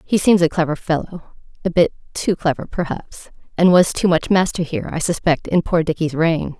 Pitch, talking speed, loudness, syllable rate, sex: 165 Hz, 180 wpm, -18 LUFS, 5.3 syllables/s, female